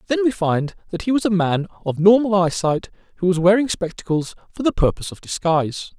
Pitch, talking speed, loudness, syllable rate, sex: 190 Hz, 200 wpm, -20 LUFS, 5.9 syllables/s, male